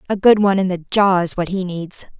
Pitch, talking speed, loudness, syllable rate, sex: 185 Hz, 275 wpm, -17 LUFS, 5.8 syllables/s, female